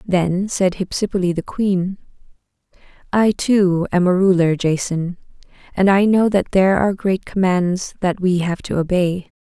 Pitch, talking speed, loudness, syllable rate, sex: 185 Hz, 155 wpm, -18 LUFS, 4.6 syllables/s, female